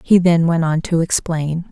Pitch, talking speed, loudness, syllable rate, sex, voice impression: 165 Hz, 210 wpm, -17 LUFS, 4.4 syllables/s, female, very feminine, slightly middle-aged, thin, tensed, slightly weak, bright, slightly soft, slightly muffled, fluent, slightly raspy, cute, slightly cool, intellectual, refreshing, sincere, calm, friendly, reassuring, unique, elegant, wild, slightly sweet, lively, kind, slightly intense, slightly modest